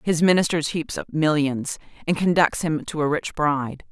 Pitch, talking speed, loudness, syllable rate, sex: 155 Hz, 185 wpm, -22 LUFS, 5.0 syllables/s, female